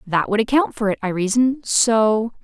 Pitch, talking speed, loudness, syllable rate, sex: 225 Hz, 195 wpm, -18 LUFS, 5.0 syllables/s, female